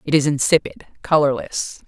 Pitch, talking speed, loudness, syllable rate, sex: 145 Hz, 130 wpm, -19 LUFS, 4.9 syllables/s, female